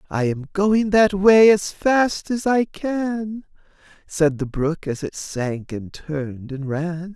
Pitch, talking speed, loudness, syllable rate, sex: 175 Hz, 170 wpm, -20 LUFS, 3.4 syllables/s, male